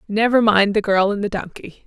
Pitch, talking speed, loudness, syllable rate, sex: 210 Hz, 225 wpm, -17 LUFS, 5.3 syllables/s, female